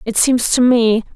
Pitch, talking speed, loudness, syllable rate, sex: 235 Hz, 210 wpm, -14 LUFS, 4.3 syllables/s, female